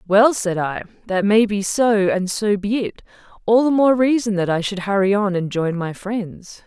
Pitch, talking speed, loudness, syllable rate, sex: 205 Hz, 215 wpm, -19 LUFS, 4.5 syllables/s, female